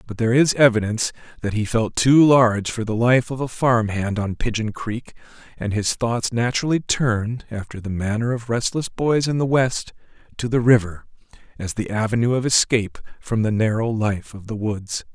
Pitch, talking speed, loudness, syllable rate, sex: 115 Hz, 185 wpm, -20 LUFS, 5.1 syllables/s, male